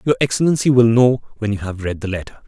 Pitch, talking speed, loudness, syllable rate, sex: 115 Hz, 240 wpm, -17 LUFS, 6.5 syllables/s, male